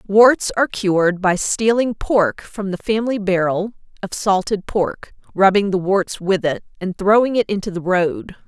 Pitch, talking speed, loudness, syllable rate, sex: 195 Hz, 170 wpm, -18 LUFS, 4.5 syllables/s, female